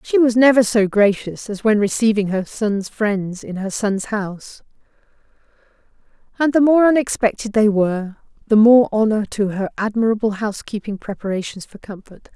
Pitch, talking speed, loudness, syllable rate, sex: 215 Hz, 150 wpm, -18 LUFS, 5.1 syllables/s, female